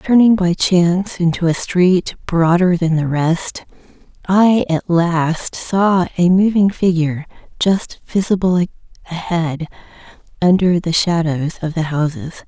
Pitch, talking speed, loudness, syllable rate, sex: 175 Hz, 125 wpm, -16 LUFS, 4.1 syllables/s, female